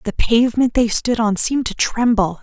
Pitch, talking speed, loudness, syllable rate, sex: 230 Hz, 200 wpm, -17 LUFS, 5.2 syllables/s, female